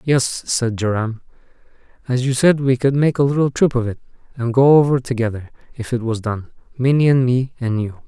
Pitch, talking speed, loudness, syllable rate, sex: 125 Hz, 195 wpm, -18 LUFS, 5.4 syllables/s, male